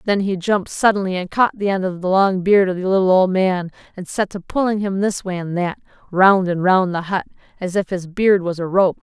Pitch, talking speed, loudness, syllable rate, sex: 190 Hz, 250 wpm, -18 LUFS, 5.4 syllables/s, female